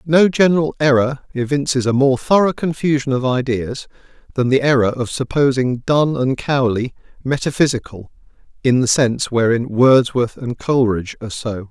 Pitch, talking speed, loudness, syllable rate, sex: 130 Hz, 145 wpm, -17 LUFS, 5.2 syllables/s, male